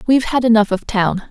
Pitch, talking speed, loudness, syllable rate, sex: 225 Hz, 230 wpm, -15 LUFS, 6.0 syllables/s, female